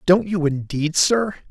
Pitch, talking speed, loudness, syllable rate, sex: 175 Hz, 160 wpm, -20 LUFS, 4.0 syllables/s, male